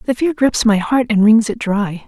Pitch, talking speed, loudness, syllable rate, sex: 225 Hz, 260 wpm, -15 LUFS, 4.8 syllables/s, female